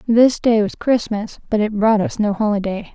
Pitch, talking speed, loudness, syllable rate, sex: 215 Hz, 205 wpm, -18 LUFS, 4.8 syllables/s, female